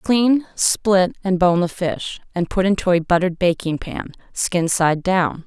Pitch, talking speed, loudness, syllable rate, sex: 180 Hz, 175 wpm, -19 LUFS, 4.2 syllables/s, female